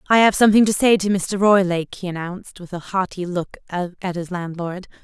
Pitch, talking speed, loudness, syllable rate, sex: 185 Hz, 205 wpm, -20 LUFS, 5.5 syllables/s, female